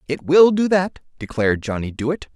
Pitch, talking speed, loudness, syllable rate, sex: 150 Hz, 180 wpm, -18 LUFS, 5.0 syllables/s, male